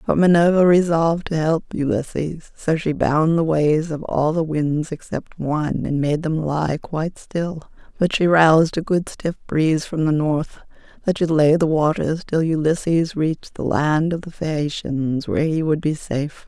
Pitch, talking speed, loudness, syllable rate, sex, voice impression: 155 Hz, 185 wpm, -20 LUFS, 4.6 syllables/s, female, feminine, very adult-like, slightly muffled, calm, slightly reassuring, elegant